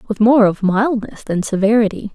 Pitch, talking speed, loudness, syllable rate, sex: 215 Hz, 170 wpm, -16 LUFS, 5.0 syllables/s, female